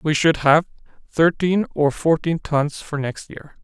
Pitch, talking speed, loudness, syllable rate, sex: 155 Hz, 165 wpm, -19 LUFS, 3.9 syllables/s, male